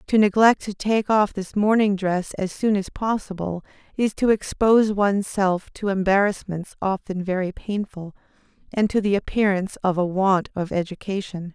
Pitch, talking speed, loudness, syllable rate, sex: 195 Hz, 160 wpm, -22 LUFS, 4.9 syllables/s, female